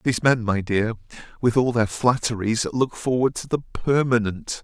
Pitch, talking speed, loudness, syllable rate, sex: 120 Hz, 170 wpm, -22 LUFS, 4.9 syllables/s, male